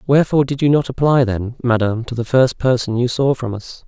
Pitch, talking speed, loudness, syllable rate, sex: 125 Hz, 230 wpm, -17 LUFS, 6.0 syllables/s, male